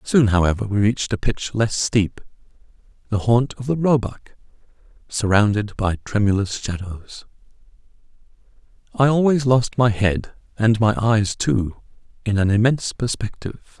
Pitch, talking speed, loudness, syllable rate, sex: 110 Hz, 130 wpm, -20 LUFS, 4.6 syllables/s, male